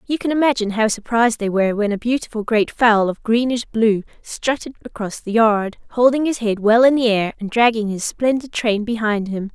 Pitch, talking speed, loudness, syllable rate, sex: 225 Hz, 205 wpm, -18 LUFS, 5.4 syllables/s, female